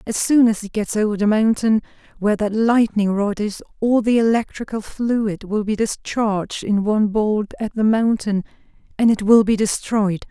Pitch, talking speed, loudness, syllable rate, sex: 215 Hz, 180 wpm, -19 LUFS, 4.8 syllables/s, female